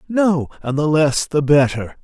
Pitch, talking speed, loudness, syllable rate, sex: 150 Hz, 175 wpm, -17 LUFS, 4.1 syllables/s, male